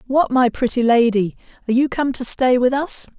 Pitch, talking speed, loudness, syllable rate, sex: 250 Hz, 205 wpm, -17 LUFS, 5.3 syllables/s, female